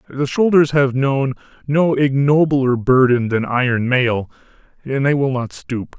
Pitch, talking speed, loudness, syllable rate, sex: 135 Hz, 150 wpm, -17 LUFS, 4.1 syllables/s, male